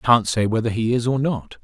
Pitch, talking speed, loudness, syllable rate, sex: 115 Hz, 255 wpm, -20 LUFS, 5.1 syllables/s, male